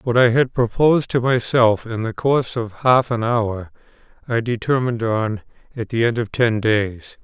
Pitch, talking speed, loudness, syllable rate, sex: 115 Hz, 180 wpm, -19 LUFS, 4.7 syllables/s, male